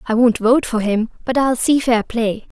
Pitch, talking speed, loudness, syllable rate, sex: 235 Hz, 230 wpm, -17 LUFS, 4.6 syllables/s, female